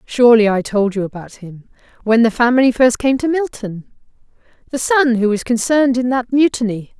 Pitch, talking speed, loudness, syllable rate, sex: 235 Hz, 170 wpm, -15 LUFS, 5.4 syllables/s, female